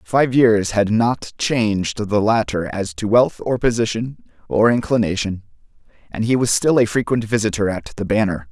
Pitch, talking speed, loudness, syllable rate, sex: 110 Hz, 170 wpm, -18 LUFS, 4.7 syllables/s, male